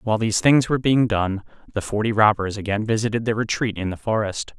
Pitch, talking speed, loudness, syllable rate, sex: 110 Hz, 210 wpm, -21 LUFS, 6.2 syllables/s, male